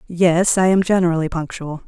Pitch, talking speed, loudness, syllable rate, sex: 175 Hz, 160 wpm, -17 LUFS, 5.3 syllables/s, female